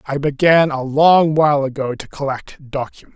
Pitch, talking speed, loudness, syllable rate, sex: 145 Hz, 170 wpm, -16 LUFS, 5.0 syllables/s, male